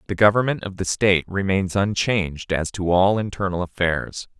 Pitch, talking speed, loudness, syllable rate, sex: 95 Hz, 165 wpm, -21 LUFS, 5.1 syllables/s, male